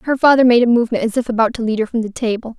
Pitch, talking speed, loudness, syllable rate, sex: 235 Hz, 325 wpm, -16 LUFS, 7.5 syllables/s, female